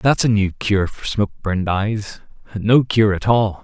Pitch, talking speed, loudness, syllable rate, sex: 105 Hz, 200 wpm, -18 LUFS, 4.4 syllables/s, male